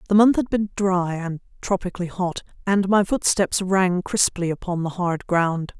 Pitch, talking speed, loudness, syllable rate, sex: 185 Hz, 175 wpm, -22 LUFS, 4.5 syllables/s, female